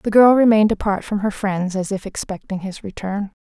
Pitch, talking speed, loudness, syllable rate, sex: 200 Hz, 210 wpm, -19 LUFS, 5.5 syllables/s, female